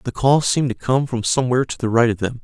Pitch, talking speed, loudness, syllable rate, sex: 125 Hz, 295 wpm, -18 LUFS, 6.9 syllables/s, male